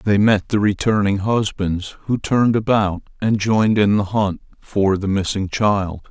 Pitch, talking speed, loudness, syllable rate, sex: 105 Hz, 165 wpm, -18 LUFS, 4.4 syllables/s, male